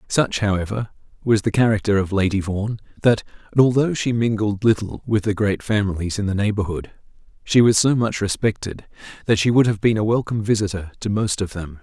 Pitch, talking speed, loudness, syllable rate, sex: 105 Hz, 190 wpm, -20 LUFS, 5.7 syllables/s, male